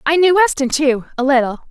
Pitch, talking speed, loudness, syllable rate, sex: 290 Hz, 210 wpm, -15 LUFS, 5.8 syllables/s, female